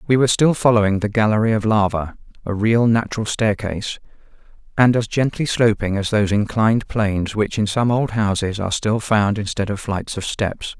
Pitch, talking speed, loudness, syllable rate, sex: 105 Hz, 185 wpm, -19 LUFS, 5.5 syllables/s, male